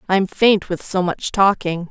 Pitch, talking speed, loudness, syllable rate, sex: 185 Hz, 190 wpm, -18 LUFS, 4.1 syllables/s, female